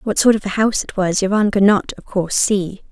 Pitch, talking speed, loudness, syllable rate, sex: 200 Hz, 270 wpm, -17 LUFS, 6.1 syllables/s, female